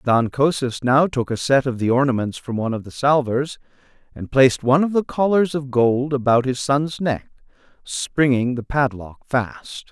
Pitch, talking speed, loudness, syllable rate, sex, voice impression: 130 Hz, 180 wpm, -20 LUFS, 4.8 syllables/s, male, masculine, adult-like, slightly middle-aged, slightly thick, tensed, slightly powerful, slightly bright, hard, slightly clear, fluent, slightly cool, intellectual, very sincere, calm, slightly mature, slightly friendly, slightly reassuring, unique, elegant, slightly wild, slightly sweet, lively, slightly kind, slightly intense